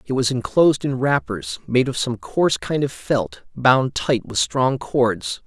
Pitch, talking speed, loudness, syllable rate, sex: 130 Hz, 185 wpm, -20 LUFS, 4.1 syllables/s, male